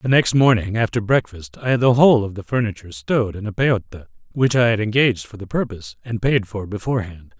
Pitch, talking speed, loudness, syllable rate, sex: 110 Hz, 220 wpm, -19 LUFS, 6.2 syllables/s, male